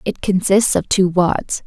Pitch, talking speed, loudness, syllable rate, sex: 190 Hz, 180 wpm, -16 LUFS, 3.8 syllables/s, female